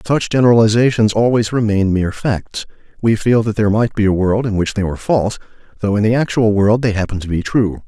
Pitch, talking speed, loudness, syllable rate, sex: 110 Hz, 220 wpm, -15 LUFS, 6.1 syllables/s, male